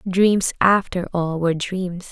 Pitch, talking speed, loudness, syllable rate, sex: 180 Hz, 140 wpm, -20 LUFS, 3.8 syllables/s, female